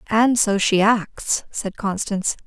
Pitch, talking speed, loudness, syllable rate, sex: 210 Hz, 145 wpm, -20 LUFS, 3.6 syllables/s, female